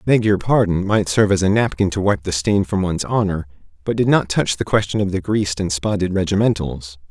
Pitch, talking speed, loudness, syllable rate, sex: 95 Hz, 230 wpm, -18 LUFS, 5.8 syllables/s, male